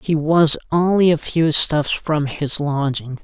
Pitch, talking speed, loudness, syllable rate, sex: 155 Hz, 165 wpm, -18 LUFS, 3.7 syllables/s, male